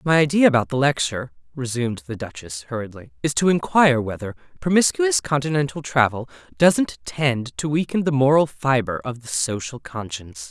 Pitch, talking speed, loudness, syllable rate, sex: 130 Hz, 155 wpm, -21 LUFS, 5.4 syllables/s, male